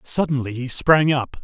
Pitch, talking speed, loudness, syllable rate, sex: 135 Hz, 170 wpm, -19 LUFS, 4.5 syllables/s, male